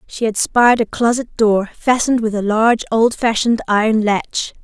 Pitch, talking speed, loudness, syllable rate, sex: 225 Hz, 170 wpm, -16 LUFS, 5.0 syllables/s, female